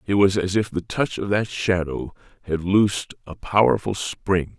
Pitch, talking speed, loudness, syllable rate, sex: 95 Hz, 185 wpm, -22 LUFS, 4.5 syllables/s, male